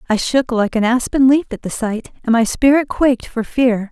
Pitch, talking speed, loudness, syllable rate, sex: 245 Hz, 230 wpm, -16 LUFS, 5.1 syllables/s, female